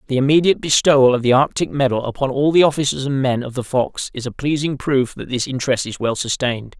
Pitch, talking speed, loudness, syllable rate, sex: 135 Hz, 230 wpm, -18 LUFS, 6.2 syllables/s, male